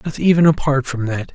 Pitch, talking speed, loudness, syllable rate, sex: 140 Hz, 225 wpm, -17 LUFS, 5.6 syllables/s, male